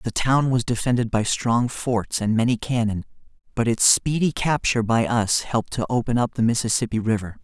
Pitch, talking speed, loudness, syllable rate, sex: 120 Hz, 185 wpm, -22 LUFS, 5.3 syllables/s, male